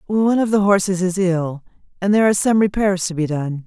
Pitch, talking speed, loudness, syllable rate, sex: 190 Hz, 230 wpm, -18 LUFS, 6.1 syllables/s, female